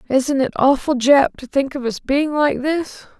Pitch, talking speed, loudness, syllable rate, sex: 275 Hz, 205 wpm, -18 LUFS, 4.3 syllables/s, female